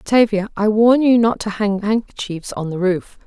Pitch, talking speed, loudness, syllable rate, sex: 210 Hz, 200 wpm, -17 LUFS, 4.6 syllables/s, female